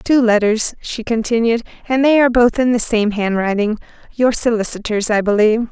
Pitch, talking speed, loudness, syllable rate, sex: 225 Hz, 160 wpm, -16 LUFS, 5.4 syllables/s, female